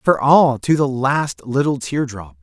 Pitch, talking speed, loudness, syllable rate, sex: 135 Hz, 175 wpm, -17 LUFS, 3.8 syllables/s, male